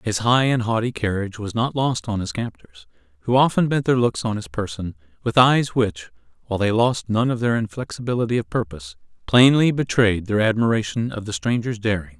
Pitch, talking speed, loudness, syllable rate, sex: 110 Hz, 190 wpm, -21 LUFS, 5.6 syllables/s, male